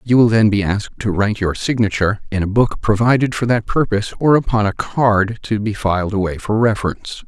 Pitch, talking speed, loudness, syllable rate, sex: 110 Hz, 215 wpm, -17 LUFS, 5.9 syllables/s, male